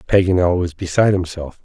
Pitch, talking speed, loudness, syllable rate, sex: 90 Hz, 145 wpm, -17 LUFS, 5.7 syllables/s, male